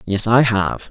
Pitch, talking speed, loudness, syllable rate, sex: 110 Hz, 200 wpm, -16 LUFS, 3.7 syllables/s, male